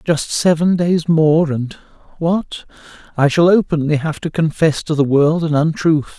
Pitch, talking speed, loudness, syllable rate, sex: 155 Hz, 155 wpm, -16 LUFS, 4.3 syllables/s, male